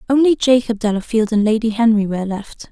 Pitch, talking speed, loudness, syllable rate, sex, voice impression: 225 Hz, 175 wpm, -16 LUFS, 6.0 syllables/s, female, very feminine, slightly young, slightly adult-like, very thin, relaxed, weak, slightly bright, very soft, clear, fluent, slightly raspy, very cute, intellectual, very refreshing, sincere, very calm, very friendly, very reassuring, very unique, very elegant, slightly wild, very sweet, very lively, very kind, very modest, light